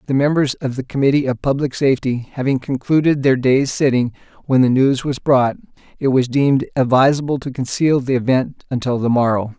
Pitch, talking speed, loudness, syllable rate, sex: 130 Hz, 180 wpm, -17 LUFS, 5.5 syllables/s, male